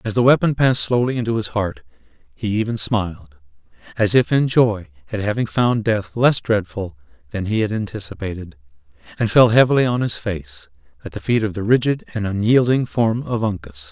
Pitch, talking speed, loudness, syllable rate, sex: 105 Hz, 180 wpm, -19 LUFS, 5.4 syllables/s, male